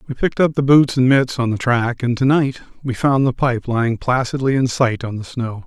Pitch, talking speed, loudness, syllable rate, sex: 125 Hz, 255 wpm, -17 LUFS, 5.3 syllables/s, male